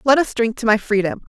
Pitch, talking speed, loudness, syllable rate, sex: 230 Hz, 265 wpm, -18 LUFS, 5.9 syllables/s, female